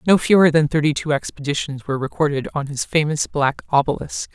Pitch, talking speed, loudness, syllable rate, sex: 150 Hz, 180 wpm, -19 LUFS, 5.8 syllables/s, female